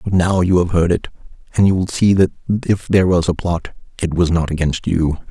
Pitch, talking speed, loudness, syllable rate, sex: 90 Hz, 240 wpm, -17 LUFS, 5.7 syllables/s, male